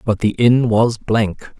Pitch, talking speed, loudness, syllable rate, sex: 110 Hz, 190 wpm, -16 LUFS, 3.4 syllables/s, male